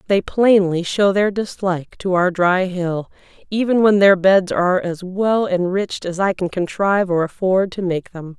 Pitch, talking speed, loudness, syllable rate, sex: 185 Hz, 185 wpm, -18 LUFS, 4.6 syllables/s, female